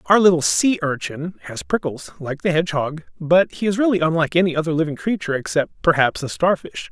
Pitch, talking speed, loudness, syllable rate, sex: 160 Hz, 190 wpm, -20 LUFS, 6.0 syllables/s, male